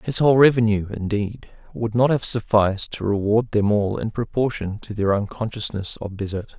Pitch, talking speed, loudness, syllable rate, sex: 110 Hz, 180 wpm, -21 LUFS, 5.2 syllables/s, male